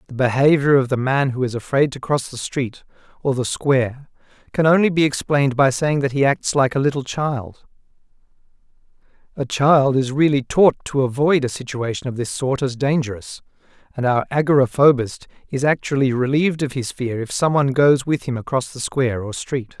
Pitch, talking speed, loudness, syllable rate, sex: 135 Hz, 190 wpm, -19 LUFS, 5.4 syllables/s, male